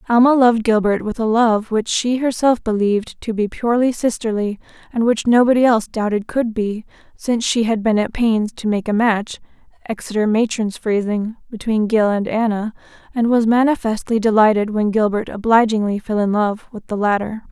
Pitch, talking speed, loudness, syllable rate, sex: 220 Hz, 170 wpm, -18 LUFS, 5.3 syllables/s, female